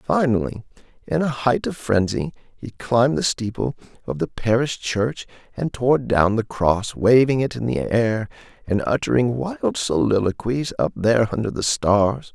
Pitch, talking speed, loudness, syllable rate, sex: 115 Hz, 160 wpm, -21 LUFS, 4.4 syllables/s, male